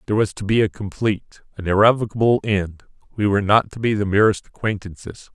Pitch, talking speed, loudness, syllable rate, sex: 100 Hz, 190 wpm, -20 LUFS, 6.2 syllables/s, male